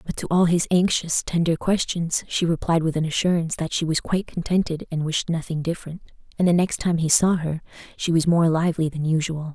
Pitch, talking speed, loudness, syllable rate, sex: 165 Hz, 215 wpm, -22 LUFS, 5.7 syllables/s, female